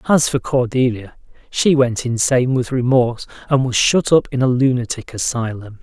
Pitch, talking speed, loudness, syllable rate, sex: 125 Hz, 165 wpm, -17 LUFS, 5.1 syllables/s, male